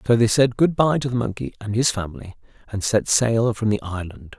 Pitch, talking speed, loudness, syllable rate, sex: 110 Hz, 235 wpm, -21 LUFS, 5.5 syllables/s, male